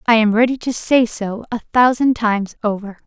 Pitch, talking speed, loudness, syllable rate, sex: 225 Hz, 195 wpm, -17 LUFS, 5.2 syllables/s, female